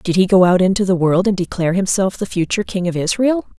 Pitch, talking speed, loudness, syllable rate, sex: 190 Hz, 250 wpm, -16 LUFS, 6.5 syllables/s, female